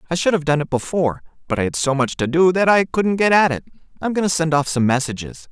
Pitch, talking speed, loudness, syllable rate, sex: 160 Hz, 285 wpm, -18 LUFS, 6.4 syllables/s, male